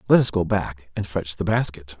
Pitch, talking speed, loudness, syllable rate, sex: 90 Hz, 240 wpm, -23 LUFS, 5.1 syllables/s, male